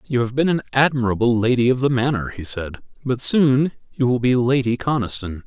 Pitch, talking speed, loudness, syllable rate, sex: 125 Hz, 200 wpm, -19 LUFS, 5.5 syllables/s, male